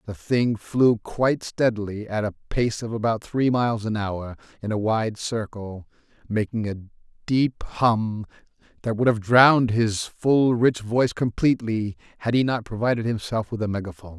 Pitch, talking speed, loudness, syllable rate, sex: 110 Hz, 165 wpm, -23 LUFS, 5.0 syllables/s, male